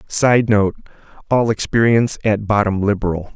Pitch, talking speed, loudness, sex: 105 Hz, 105 wpm, -17 LUFS, male